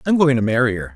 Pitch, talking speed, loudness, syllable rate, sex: 125 Hz, 315 wpm, -17 LUFS, 7.2 syllables/s, male